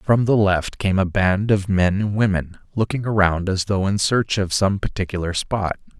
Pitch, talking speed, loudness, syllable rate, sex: 100 Hz, 200 wpm, -20 LUFS, 4.7 syllables/s, male